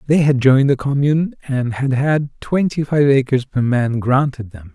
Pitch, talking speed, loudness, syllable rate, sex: 135 Hz, 190 wpm, -17 LUFS, 4.8 syllables/s, male